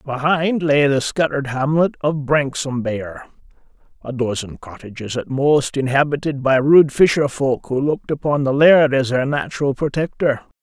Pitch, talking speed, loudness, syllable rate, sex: 140 Hz, 140 wpm, -18 LUFS, 4.9 syllables/s, male